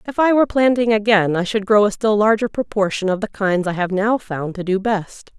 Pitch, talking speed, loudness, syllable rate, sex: 210 Hz, 245 wpm, -18 LUFS, 5.4 syllables/s, female